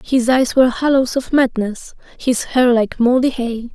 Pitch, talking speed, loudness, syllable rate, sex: 250 Hz, 175 wpm, -16 LUFS, 4.4 syllables/s, female